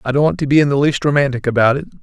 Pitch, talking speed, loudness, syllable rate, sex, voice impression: 140 Hz, 325 wpm, -15 LUFS, 7.8 syllables/s, male, masculine, adult-like, slightly thick, powerful, bright, raspy, cool, friendly, reassuring, wild, lively, slightly strict